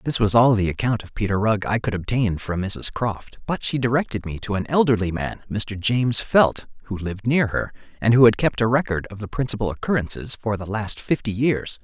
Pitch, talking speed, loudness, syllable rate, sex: 110 Hz, 225 wpm, -22 LUFS, 5.5 syllables/s, male